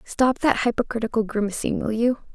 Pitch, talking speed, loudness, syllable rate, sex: 230 Hz, 155 wpm, -23 LUFS, 5.6 syllables/s, female